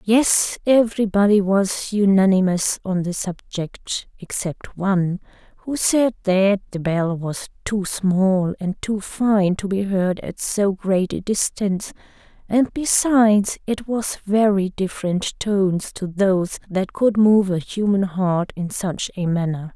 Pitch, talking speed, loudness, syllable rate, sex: 195 Hz, 145 wpm, -20 LUFS, 3.9 syllables/s, female